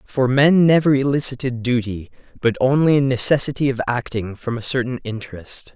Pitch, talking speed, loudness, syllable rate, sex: 130 Hz, 155 wpm, -18 LUFS, 5.4 syllables/s, male